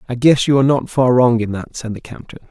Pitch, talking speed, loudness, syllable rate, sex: 125 Hz, 285 wpm, -15 LUFS, 6.3 syllables/s, male